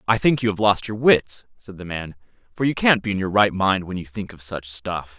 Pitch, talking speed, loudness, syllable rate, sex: 100 Hz, 265 wpm, -21 LUFS, 5.2 syllables/s, male